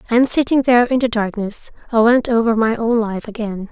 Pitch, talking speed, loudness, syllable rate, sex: 230 Hz, 210 wpm, -17 LUFS, 5.5 syllables/s, female